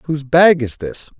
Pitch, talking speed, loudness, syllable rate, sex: 150 Hz, 200 wpm, -14 LUFS, 4.7 syllables/s, male